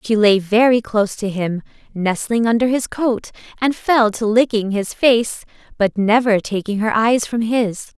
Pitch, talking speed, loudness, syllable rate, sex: 220 Hz, 175 wpm, -17 LUFS, 4.4 syllables/s, female